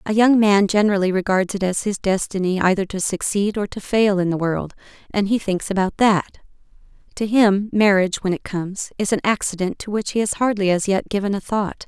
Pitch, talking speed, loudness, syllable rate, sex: 200 Hz, 210 wpm, -20 LUFS, 5.5 syllables/s, female